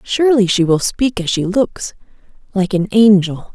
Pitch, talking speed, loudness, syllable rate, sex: 200 Hz, 170 wpm, -15 LUFS, 4.6 syllables/s, female